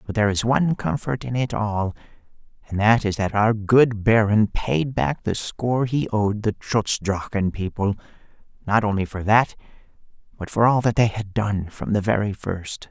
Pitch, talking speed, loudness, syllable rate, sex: 105 Hz, 185 wpm, -22 LUFS, 4.7 syllables/s, male